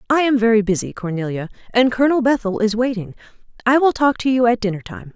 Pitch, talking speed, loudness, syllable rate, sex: 230 Hz, 210 wpm, -18 LUFS, 6.4 syllables/s, female